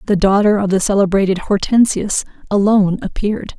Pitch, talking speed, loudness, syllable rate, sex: 200 Hz, 135 wpm, -15 LUFS, 5.8 syllables/s, female